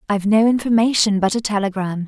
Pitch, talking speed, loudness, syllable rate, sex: 210 Hz, 175 wpm, -17 LUFS, 6.4 syllables/s, female